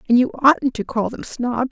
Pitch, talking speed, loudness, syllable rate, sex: 245 Hz, 245 wpm, -19 LUFS, 4.7 syllables/s, female